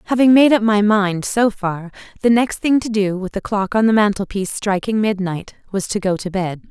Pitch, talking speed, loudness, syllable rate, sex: 205 Hz, 235 wpm, -17 LUFS, 3.5 syllables/s, female